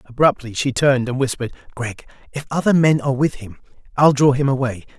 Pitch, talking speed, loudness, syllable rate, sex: 130 Hz, 195 wpm, -18 LUFS, 6.3 syllables/s, male